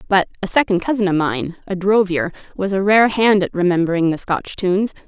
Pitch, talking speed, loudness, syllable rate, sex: 190 Hz, 200 wpm, -18 LUFS, 5.7 syllables/s, female